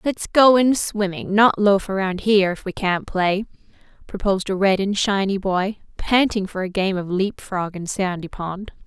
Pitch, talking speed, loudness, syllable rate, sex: 195 Hz, 190 wpm, -20 LUFS, 4.4 syllables/s, female